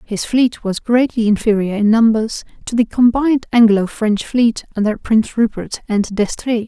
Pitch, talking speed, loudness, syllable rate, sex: 225 Hz, 160 wpm, -16 LUFS, 4.7 syllables/s, female